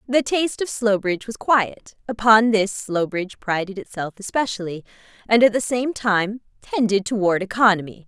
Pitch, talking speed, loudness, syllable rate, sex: 210 Hz, 135 wpm, -20 LUFS, 5.2 syllables/s, female